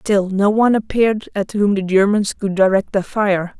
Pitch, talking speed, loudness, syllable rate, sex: 200 Hz, 200 wpm, -17 LUFS, 4.9 syllables/s, female